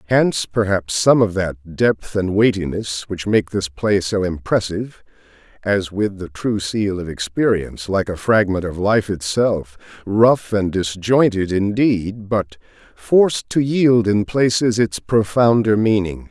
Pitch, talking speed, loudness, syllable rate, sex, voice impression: 100 Hz, 145 wpm, -18 LUFS, 4.1 syllables/s, male, very masculine, slightly old, very thick, very tensed, very powerful, bright, slightly soft, slightly muffled, fluent, raspy, cool, intellectual, refreshing, very sincere, very calm, very friendly, reassuring, very unique, elegant, very wild, sweet, very lively, kind, slightly intense